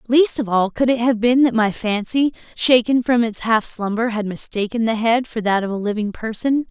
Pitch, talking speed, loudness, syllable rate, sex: 230 Hz, 225 wpm, -19 LUFS, 5.1 syllables/s, female